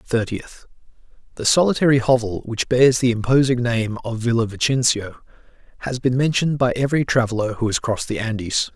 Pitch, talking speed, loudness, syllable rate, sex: 120 Hz, 150 wpm, -19 LUFS, 5.6 syllables/s, male